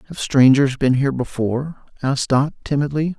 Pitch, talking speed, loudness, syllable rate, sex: 135 Hz, 150 wpm, -18 LUFS, 5.6 syllables/s, male